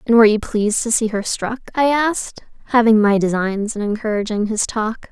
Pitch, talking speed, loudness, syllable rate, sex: 220 Hz, 200 wpm, -18 LUFS, 5.6 syllables/s, female